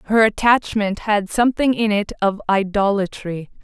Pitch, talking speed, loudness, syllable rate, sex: 210 Hz, 130 wpm, -18 LUFS, 4.7 syllables/s, female